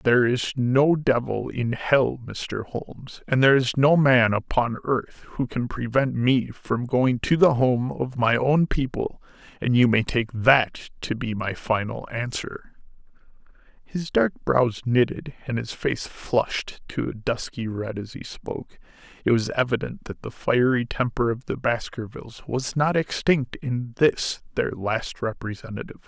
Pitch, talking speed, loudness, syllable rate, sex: 125 Hz, 165 wpm, -24 LUFS, 4.2 syllables/s, male